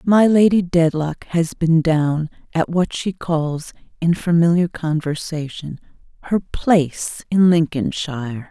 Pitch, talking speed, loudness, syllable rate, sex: 165 Hz, 120 wpm, -19 LUFS, 3.8 syllables/s, female